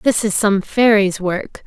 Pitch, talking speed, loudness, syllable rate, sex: 205 Hz, 180 wpm, -16 LUFS, 3.7 syllables/s, female